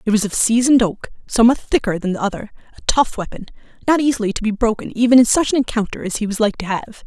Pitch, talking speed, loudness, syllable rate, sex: 225 Hz, 245 wpm, -17 LUFS, 7.0 syllables/s, female